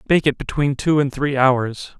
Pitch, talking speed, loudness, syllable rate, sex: 140 Hz, 210 wpm, -19 LUFS, 4.4 syllables/s, male